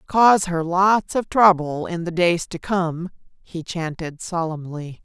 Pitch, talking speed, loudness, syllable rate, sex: 175 Hz, 155 wpm, -20 LUFS, 4.0 syllables/s, female